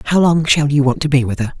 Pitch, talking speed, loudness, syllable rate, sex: 145 Hz, 340 wpm, -15 LUFS, 6.8 syllables/s, male